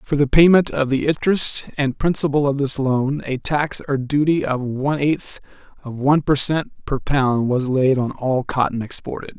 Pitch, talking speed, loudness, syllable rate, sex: 140 Hz, 190 wpm, -19 LUFS, 4.8 syllables/s, male